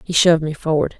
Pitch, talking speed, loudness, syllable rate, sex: 160 Hz, 240 wpm, -17 LUFS, 6.7 syllables/s, female